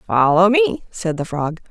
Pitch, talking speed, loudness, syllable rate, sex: 185 Hz, 175 wpm, -17 LUFS, 4.2 syllables/s, female